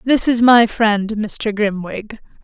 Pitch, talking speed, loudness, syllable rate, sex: 220 Hz, 150 wpm, -15 LUFS, 3.3 syllables/s, female